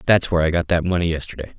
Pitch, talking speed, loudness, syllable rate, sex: 85 Hz, 265 wpm, -20 LUFS, 7.9 syllables/s, male